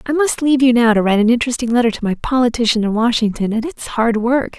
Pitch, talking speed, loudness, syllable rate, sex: 240 Hz, 250 wpm, -16 LUFS, 6.8 syllables/s, female